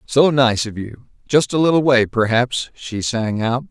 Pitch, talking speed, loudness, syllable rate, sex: 125 Hz, 180 wpm, -17 LUFS, 4.2 syllables/s, male